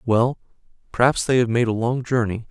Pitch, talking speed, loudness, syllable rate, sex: 120 Hz, 190 wpm, -20 LUFS, 5.4 syllables/s, male